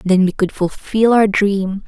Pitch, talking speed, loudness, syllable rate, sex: 200 Hz, 190 wpm, -16 LUFS, 4.0 syllables/s, female